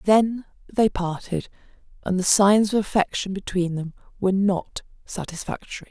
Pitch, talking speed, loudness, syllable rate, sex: 195 Hz, 130 wpm, -23 LUFS, 4.8 syllables/s, female